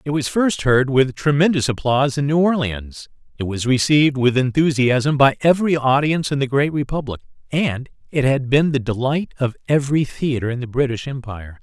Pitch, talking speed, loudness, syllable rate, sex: 135 Hz, 180 wpm, -18 LUFS, 5.4 syllables/s, male